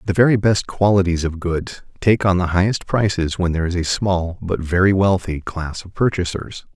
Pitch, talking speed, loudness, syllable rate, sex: 90 Hz, 195 wpm, -19 LUFS, 5.1 syllables/s, male